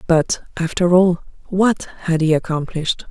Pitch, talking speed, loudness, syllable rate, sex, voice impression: 170 Hz, 135 wpm, -18 LUFS, 4.3 syllables/s, female, very feminine, very adult-like, slightly middle-aged, very thin, relaxed, very weak, slightly bright, very soft, clear, very fluent, raspy, very cute, very intellectual, refreshing, very sincere, very calm, very friendly, very reassuring, very unique, very elegant, slightly wild, very sweet, slightly lively, very kind, very modest, light